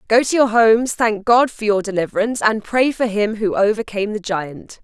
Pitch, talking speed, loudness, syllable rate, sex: 215 Hz, 210 wpm, -17 LUFS, 5.4 syllables/s, female